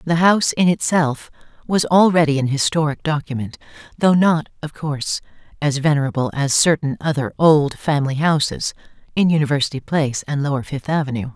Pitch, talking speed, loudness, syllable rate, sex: 150 Hz, 150 wpm, -18 LUFS, 5.6 syllables/s, female